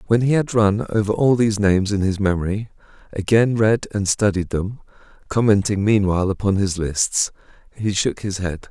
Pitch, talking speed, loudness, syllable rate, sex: 100 Hz, 170 wpm, -19 LUFS, 5.1 syllables/s, male